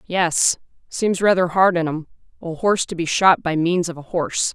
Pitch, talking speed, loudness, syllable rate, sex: 175 Hz, 200 wpm, -19 LUFS, 5.0 syllables/s, female